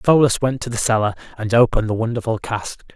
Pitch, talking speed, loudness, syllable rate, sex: 115 Hz, 205 wpm, -19 LUFS, 6.2 syllables/s, male